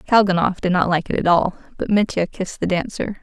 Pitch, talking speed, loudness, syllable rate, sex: 185 Hz, 225 wpm, -20 LUFS, 6.1 syllables/s, female